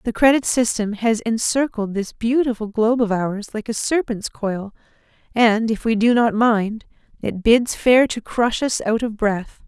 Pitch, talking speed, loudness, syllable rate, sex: 225 Hz, 180 wpm, -19 LUFS, 4.4 syllables/s, female